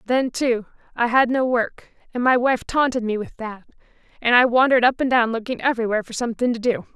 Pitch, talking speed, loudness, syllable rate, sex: 240 Hz, 215 wpm, -20 LUFS, 6.1 syllables/s, female